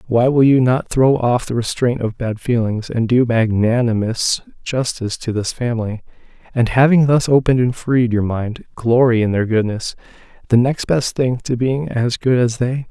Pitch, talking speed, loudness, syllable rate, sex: 120 Hz, 185 wpm, -17 LUFS, 4.8 syllables/s, male